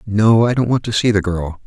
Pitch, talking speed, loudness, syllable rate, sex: 105 Hz, 290 wpm, -16 LUFS, 5.3 syllables/s, male